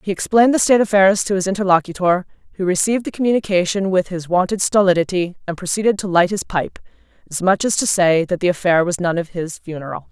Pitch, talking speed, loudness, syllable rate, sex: 185 Hz, 215 wpm, -17 LUFS, 6.5 syllables/s, female